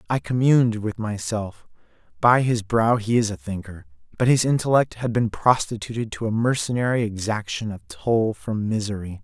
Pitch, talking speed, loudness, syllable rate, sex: 110 Hz, 165 wpm, -22 LUFS, 5.0 syllables/s, male